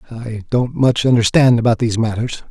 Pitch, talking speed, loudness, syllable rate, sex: 115 Hz, 165 wpm, -15 LUFS, 5.5 syllables/s, male